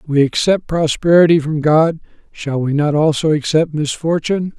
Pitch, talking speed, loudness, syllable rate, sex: 155 Hz, 145 wpm, -15 LUFS, 4.9 syllables/s, male